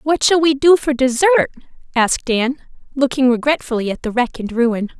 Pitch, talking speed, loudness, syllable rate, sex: 260 Hz, 180 wpm, -16 LUFS, 5.5 syllables/s, female